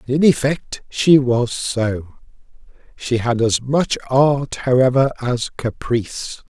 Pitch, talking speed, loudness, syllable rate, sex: 125 Hz, 130 wpm, -18 LUFS, 3.6 syllables/s, male